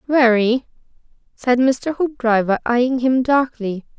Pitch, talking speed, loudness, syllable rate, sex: 245 Hz, 105 wpm, -18 LUFS, 3.7 syllables/s, female